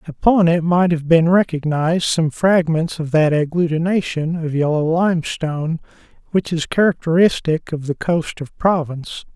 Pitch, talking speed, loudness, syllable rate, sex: 165 Hz, 140 wpm, -18 LUFS, 4.8 syllables/s, male